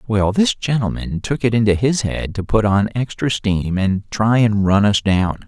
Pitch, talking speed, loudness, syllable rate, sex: 110 Hz, 210 wpm, -18 LUFS, 4.4 syllables/s, male